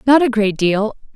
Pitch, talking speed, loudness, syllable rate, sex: 225 Hz, 210 wpm, -16 LUFS, 4.7 syllables/s, female